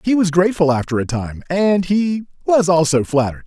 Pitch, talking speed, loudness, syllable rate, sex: 170 Hz, 190 wpm, -17 LUFS, 5.5 syllables/s, male